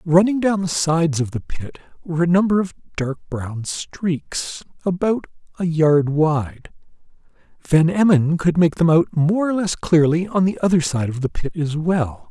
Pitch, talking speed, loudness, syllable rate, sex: 165 Hz, 180 wpm, -19 LUFS, 4.4 syllables/s, male